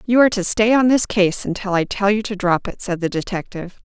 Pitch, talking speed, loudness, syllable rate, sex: 200 Hz, 265 wpm, -18 LUFS, 5.9 syllables/s, female